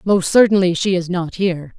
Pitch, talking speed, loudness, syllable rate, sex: 180 Hz, 200 wpm, -16 LUFS, 5.4 syllables/s, female